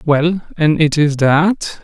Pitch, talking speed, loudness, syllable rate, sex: 160 Hz, 165 wpm, -14 LUFS, 3.2 syllables/s, male